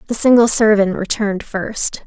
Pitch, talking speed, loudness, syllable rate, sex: 215 Hz, 145 wpm, -15 LUFS, 4.8 syllables/s, female